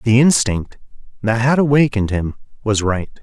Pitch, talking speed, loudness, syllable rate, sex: 115 Hz, 150 wpm, -17 LUFS, 4.8 syllables/s, male